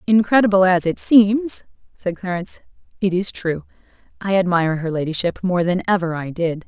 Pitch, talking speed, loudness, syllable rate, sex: 185 Hz, 160 wpm, -19 LUFS, 5.4 syllables/s, female